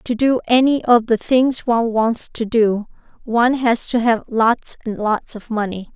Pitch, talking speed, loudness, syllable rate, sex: 230 Hz, 190 wpm, -18 LUFS, 4.4 syllables/s, female